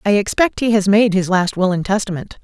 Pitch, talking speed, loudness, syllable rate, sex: 200 Hz, 245 wpm, -16 LUFS, 5.6 syllables/s, female